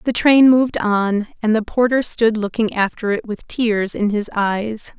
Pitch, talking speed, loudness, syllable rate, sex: 220 Hz, 195 wpm, -17 LUFS, 4.3 syllables/s, female